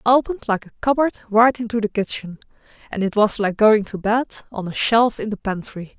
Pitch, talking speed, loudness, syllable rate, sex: 220 Hz, 220 wpm, -20 LUFS, 5.7 syllables/s, female